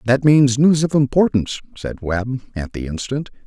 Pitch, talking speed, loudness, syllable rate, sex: 125 Hz, 175 wpm, -18 LUFS, 5.0 syllables/s, male